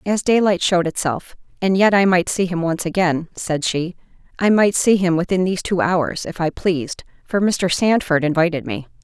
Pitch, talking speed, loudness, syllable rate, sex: 185 Hz, 185 wpm, -18 LUFS, 5.2 syllables/s, female